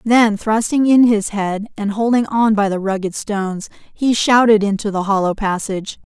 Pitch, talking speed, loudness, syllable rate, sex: 210 Hz, 175 wpm, -16 LUFS, 4.7 syllables/s, female